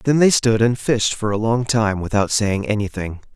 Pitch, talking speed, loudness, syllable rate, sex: 110 Hz, 215 wpm, -18 LUFS, 4.8 syllables/s, male